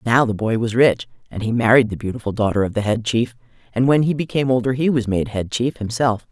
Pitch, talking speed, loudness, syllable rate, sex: 120 Hz, 245 wpm, -19 LUFS, 6.1 syllables/s, female